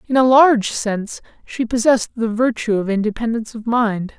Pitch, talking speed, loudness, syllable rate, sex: 230 Hz, 170 wpm, -17 LUFS, 5.7 syllables/s, male